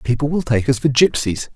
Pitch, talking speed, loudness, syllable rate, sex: 130 Hz, 230 wpm, -17 LUFS, 5.6 syllables/s, male